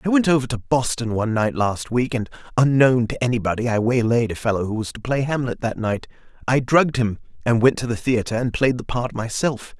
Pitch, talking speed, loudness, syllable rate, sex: 120 Hz, 225 wpm, -21 LUFS, 5.8 syllables/s, male